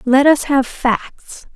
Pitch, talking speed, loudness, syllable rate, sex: 270 Hz, 155 wpm, -15 LUFS, 2.9 syllables/s, female